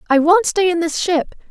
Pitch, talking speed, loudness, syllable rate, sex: 340 Hz, 240 wpm, -16 LUFS, 5.1 syllables/s, female